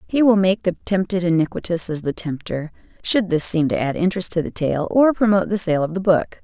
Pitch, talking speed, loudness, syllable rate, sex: 180 Hz, 235 wpm, -19 LUFS, 5.8 syllables/s, female